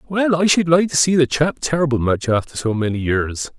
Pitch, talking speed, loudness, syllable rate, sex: 145 Hz, 235 wpm, -18 LUFS, 5.4 syllables/s, male